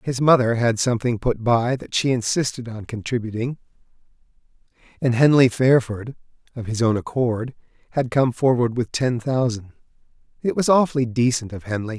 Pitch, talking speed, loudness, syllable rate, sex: 120 Hz, 150 wpm, -21 LUFS, 5.2 syllables/s, male